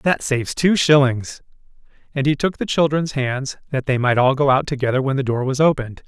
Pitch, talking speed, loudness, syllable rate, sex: 135 Hz, 215 wpm, -19 LUFS, 5.6 syllables/s, male